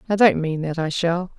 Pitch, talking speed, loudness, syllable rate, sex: 175 Hz, 260 wpm, -21 LUFS, 5.3 syllables/s, female